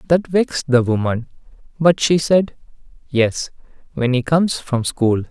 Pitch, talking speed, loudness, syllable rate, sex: 140 Hz, 145 wpm, -18 LUFS, 4.4 syllables/s, male